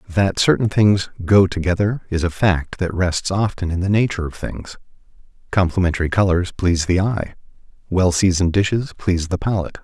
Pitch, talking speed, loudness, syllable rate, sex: 95 Hz, 165 wpm, -19 LUFS, 5.6 syllables/s, male